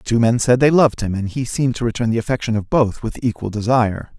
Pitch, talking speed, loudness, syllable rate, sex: 115 Hz, 260 wpm, -18 LUFS, 6.3 syllables/s, male